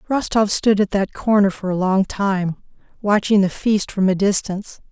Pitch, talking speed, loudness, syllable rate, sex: 200 Hz, 185 wpm, -19 LUFS, 4.7 syllables/s, female